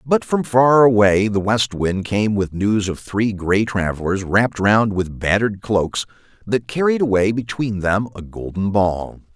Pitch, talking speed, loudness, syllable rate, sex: 105 Hz, 175 wpm, -18 LUFS, 4.2 syllables/s, male